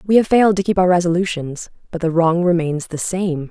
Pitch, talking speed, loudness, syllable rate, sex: 175 Hz, 225 wpm, -17 LUFS, 5.7 syllables/s, female